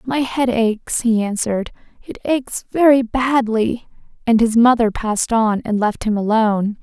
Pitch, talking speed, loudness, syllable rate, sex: 230 Hz, 160 wpm, -17 LUFS, 4.7 syllables/s, female